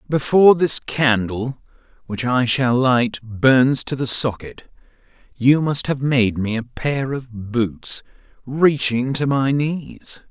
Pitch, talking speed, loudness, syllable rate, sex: 130 Hz, 140 wpm, -19 LUFS, 3.4 syllables/s, male